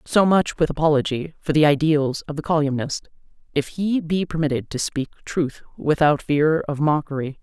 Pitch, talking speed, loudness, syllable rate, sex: 150 Hz, 170 wpm, -21 LUFS, 4.9 syllables/s, female